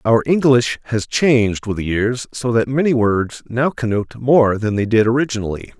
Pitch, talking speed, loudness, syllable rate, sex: 120 Hz, 185 wpm, -17 LUFS, 5.0 syllables/s, male